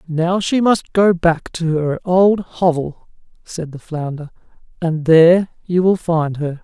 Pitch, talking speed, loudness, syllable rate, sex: 170 Hz, 165 wpm, -16 LUFS, 3.9 syllables/s, male